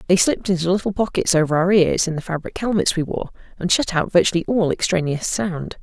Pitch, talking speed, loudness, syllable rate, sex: 180 Hz, 215 wpm, -19 LUFS, 6.0 syllables/s, female